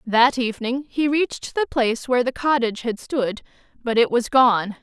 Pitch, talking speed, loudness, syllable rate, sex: 250 Hz, 185 wpm, -21 LUFS, 5.2 syllables/s, female